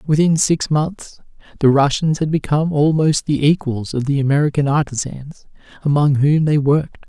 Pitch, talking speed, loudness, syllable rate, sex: 145 Hz, 155 wpm, -17 LUFS, 5.0 syllables/s, male